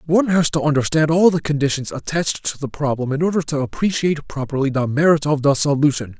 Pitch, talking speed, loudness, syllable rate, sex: 150 Hz, 205 wpm, -19 LUFS, 6.3 syllables/s, male